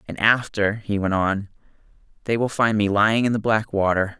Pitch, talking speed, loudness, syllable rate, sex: 105 Hz, 200 wpm, -21 LUFS, 5.2 syllables/s, male